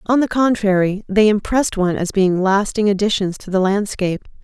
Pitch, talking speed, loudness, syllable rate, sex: 200 Hz, 175 wpm, -17 LUFS, 5.6 syllables/s, female